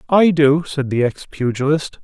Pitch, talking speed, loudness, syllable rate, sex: 145 Hz, 175 wpm, -17 LUFS, 4.4 syllables/s, male